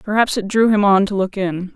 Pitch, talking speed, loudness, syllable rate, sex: 200 Hz, 275 wpm, -17 LUFS, 5.5 syllables/s, female